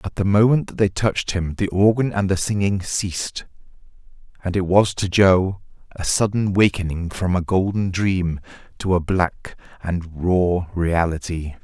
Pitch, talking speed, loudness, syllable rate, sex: 95 Hz, 160 wpm, -20 LUFS, 4.4 syllables/s, male